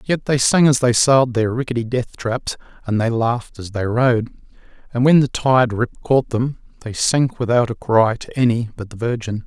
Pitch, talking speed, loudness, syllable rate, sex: 120 Hz, 210 wpm, -18 LUFS, 5.0 syllables/s, male